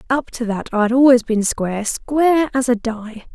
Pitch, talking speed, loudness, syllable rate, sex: 240 Hz, 195 wpm, -17 LUFS, 4.9 syllables/s, female